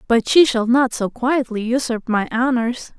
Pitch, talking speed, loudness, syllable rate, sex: 240 Hz, 180 wpm, -18 LUFS, 4.4 syllables/s, female